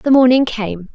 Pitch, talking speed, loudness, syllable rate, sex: 240 Hz, 190 wpm, -14 LUFS, 4.5 syllables/s, female